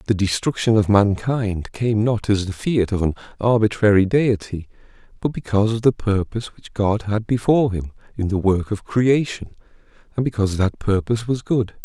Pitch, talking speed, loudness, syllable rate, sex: 105 Hz, 170 wpm, -20 LUFS, 5.3 syllables/s, male